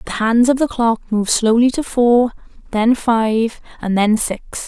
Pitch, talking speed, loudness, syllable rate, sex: 235 Hz, 180 wpm, -16 LUFS, 4.1 syllables/s, female